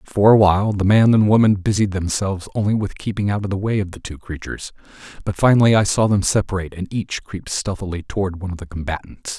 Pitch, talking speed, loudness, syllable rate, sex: 100 Hz, 225 wpm, -19 LUFS, 6.4 syllables/s, male